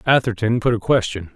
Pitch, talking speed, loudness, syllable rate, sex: 115 Hz, 180 wpm, -19 LUFS, 5.7 syllables/s, male